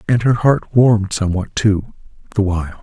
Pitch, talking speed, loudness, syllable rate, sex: 105 Hz, 170 wpm, -16 LUFS, 5.4 syllables/s, male